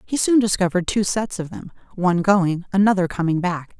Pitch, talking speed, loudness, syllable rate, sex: 190 Hz, 160 wpm, -20 LUFS, 5.7 syllables/s, female